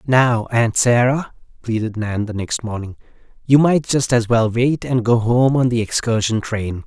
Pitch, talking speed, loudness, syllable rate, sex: 120 Hz, 185 wpm, -18 LUFS, 4.4 syllables/s, male